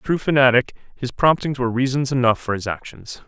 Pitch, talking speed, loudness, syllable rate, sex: 130 Hz, 200 wpm, -19 LUFS, 6.2 syllables/s, male